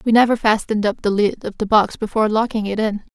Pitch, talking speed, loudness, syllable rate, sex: 215 Hz, 250 wpm, -18 LUFS, 6.4 syllables/s, female